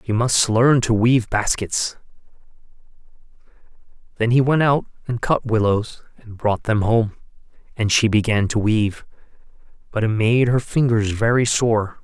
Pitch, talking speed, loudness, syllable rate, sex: 115 Hz, 145 wpm, -19 LUFS, 4.5 syllables/s, male